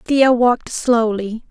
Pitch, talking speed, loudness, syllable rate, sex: 235 Hz, 120 wpm, -16 LUFS, 3.6 syllables/s, female